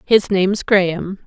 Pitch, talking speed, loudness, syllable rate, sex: 190 Hz, 140 wpm, -17 LUFS, 4.4 syllables/s, female